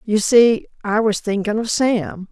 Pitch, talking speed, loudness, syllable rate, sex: 215 Hz, 180 wpm, -18 LUFS, 4.0 syllables/s, female